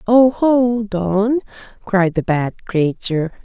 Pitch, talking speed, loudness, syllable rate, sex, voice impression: 205 Hz, 120 wpm, -17 LUFS, 3.3 syllables/s, female, very feminine, very middle-aged, very thin, slightly relaxed, weak, slightly bright, very soft, clear, fluent, slightly raspy, cute, intellectual, refreshing, very sincere, very calm, very friendly, very reassuring, very unique, very elegant, very sweet, lively, very kind, very modest, very light